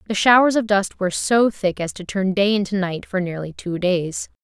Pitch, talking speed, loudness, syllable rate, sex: 195 Hz, 230 wpm, -20 LUFS, 5.1 syllables/s, female